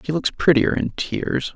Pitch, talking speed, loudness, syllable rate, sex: 145 Hz, 195 wpm, -20 LUFS, 4.3 syllables/s, male